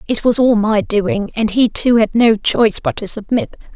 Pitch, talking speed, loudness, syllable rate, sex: 215 Hz, 225 wpm, -15 LUFS, 4.7 syllables/s, female